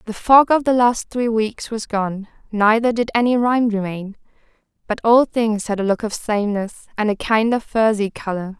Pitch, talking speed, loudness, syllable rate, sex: 220 Hz, 195 wpm, -18 LUFS, 4.8 syllables/s, female